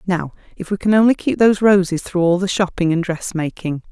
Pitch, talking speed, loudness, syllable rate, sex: 185 Hz, 215 wpm, -17 LUFS, 5.7 syllables/s, female